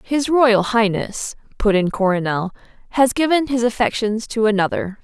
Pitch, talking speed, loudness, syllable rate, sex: 225 Hz, 145 wpm, -18 LUFS, 4.7 syllables/s, female